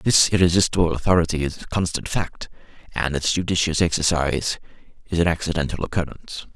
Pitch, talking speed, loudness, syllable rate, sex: 80 Hz, 135 wpm, -21 LUFS, 6.1 syllables/s, male